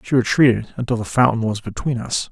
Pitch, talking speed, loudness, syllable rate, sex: 120 Hz, 205 wpm, -19 LUFS, 6.0 syllables/s, male